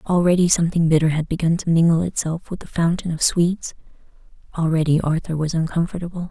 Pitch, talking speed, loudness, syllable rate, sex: 165 Hz, 170 wpm, -20 LUFS, 6.4 syllables/s, female